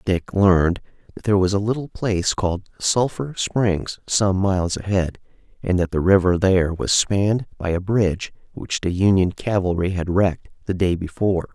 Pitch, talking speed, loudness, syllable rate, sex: 95 Hz, 170 wpm, -20 LUFS, 5.1 syllables/s, male